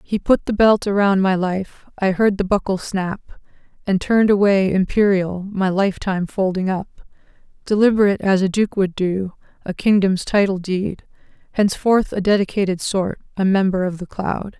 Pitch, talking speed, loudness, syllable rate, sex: 195 Hz, 160 wpm, -19 LUFS, 5.1 syllables/s, female